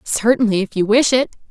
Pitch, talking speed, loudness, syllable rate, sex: 225 Hz, 200 wpm, -16 LUFS, 5.7 syllables/s, female